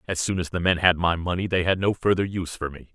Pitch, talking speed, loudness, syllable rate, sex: 90 Hz, 305 wpm, -23 LUFS, 6.5 syllables/s, male